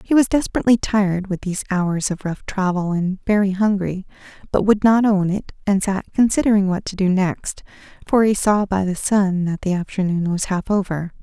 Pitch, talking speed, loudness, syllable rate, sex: 195 Hz, 200 wpm, -19 LUFS, 5.2 syllables/s, female